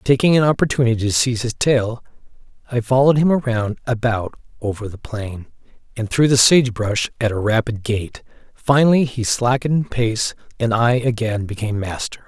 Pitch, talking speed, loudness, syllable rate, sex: 120 Hz, 160 wpm, -18 LUFS, 5.2 syllables/s, male